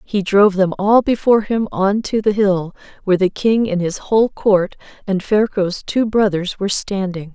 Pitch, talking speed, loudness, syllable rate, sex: 200 Hz, 190 wpm, -17 LUFS, 4.8 syllables/s, female